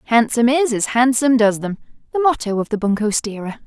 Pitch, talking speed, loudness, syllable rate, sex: 235 Hz, 180 wpm, -17 LUFS, 6.2 syllables/s, female